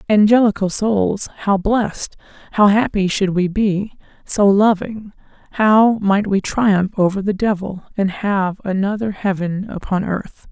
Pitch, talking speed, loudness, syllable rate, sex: 200 Hz, 135 wpm, -17 LUFS, 4.0 syllables/s, female